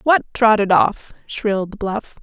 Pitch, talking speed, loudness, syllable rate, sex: 210 Hz, 135 wpm, -17 LUFS, 3.7 syllables/s, female